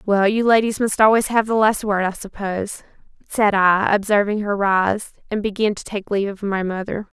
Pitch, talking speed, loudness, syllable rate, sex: 205 Hz, 200 wpm, -19 LUFS, 5.2 syllables/s, female